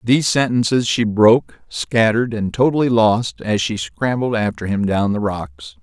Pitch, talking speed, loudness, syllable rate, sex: 115 Hz, 165 wpm, -17 LUFS, 4.6 syllables/s, male